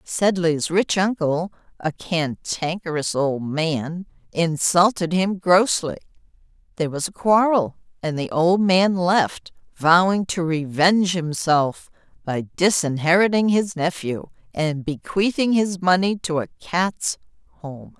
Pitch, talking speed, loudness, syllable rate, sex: 175 Hz, 115 wpm, -21 LUFS, 3.8 syllables/s, female